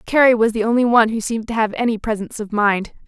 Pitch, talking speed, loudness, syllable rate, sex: 225 Hz, 255 wpm, -18 LUFS, 7.0 syllables/s, female